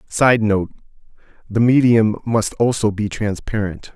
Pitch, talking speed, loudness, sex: 110 Hz, 105 wpm, -18 LUFS, male